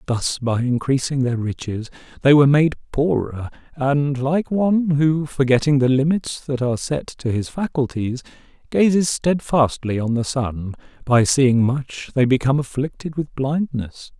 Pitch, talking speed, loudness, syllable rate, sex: 135 Hz, 150 wpm, -20 LUFS, 4.4 syllables/s, male